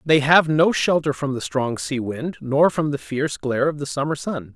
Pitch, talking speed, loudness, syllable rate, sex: 145 Hz, 235 wpm, -21 LUFS, 5.0 syllables/s, male